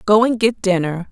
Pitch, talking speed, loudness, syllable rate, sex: 205 Hz, 215 wpm, -17 LUFS, 5.1 syllables/s, female